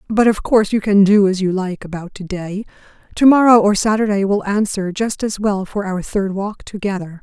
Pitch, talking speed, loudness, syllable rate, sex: 200 Hz, 210 wpm, -16 LUFS, 5.2 syllables/s, female